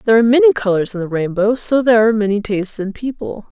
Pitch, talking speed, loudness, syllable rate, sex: 210 Hz, 235 wpm, -15 LUFS, 7.1 syllables/s, female